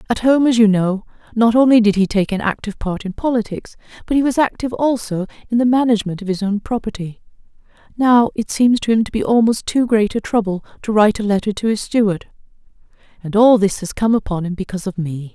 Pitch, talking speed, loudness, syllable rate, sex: 215 Hz, 220 wpm, -17 LUFS, 6.2 syllables/s, female